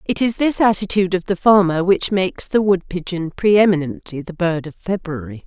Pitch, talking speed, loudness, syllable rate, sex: 180 Hz, 185 wpm, -18 LUFS, 5.4 syllables/s, female